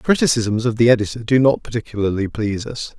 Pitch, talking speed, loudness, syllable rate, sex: 115 Hz, 200 wpm, -18 LUFS, 6.5 syllables/s, male